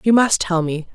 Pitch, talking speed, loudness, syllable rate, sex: 190 Hz, 255 wpm, -18 LUFS, 5.0 syllables/s, female